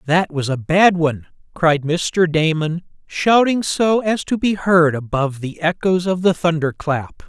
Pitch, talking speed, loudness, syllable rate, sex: 170 Hz, 165 wpm, -17 LUFS, 4.3 syllables/s, male